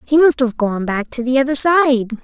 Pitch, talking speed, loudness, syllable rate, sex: 260 Hz, 240 wpm, -16 LUFS, 6.0 syllables/s, female